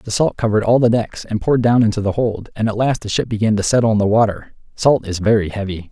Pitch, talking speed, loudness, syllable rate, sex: 110 Hz, 275 wpm, -17 LUFS, 6.4 syllables/s, male